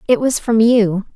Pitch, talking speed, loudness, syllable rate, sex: 225 Hz, 210 wpm, -15 LUFS, 4.4 syllables/s, female